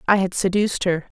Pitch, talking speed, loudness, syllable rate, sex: 190 Hz, 200 wpm, -21 LUFS, 6.2 syllables/s, female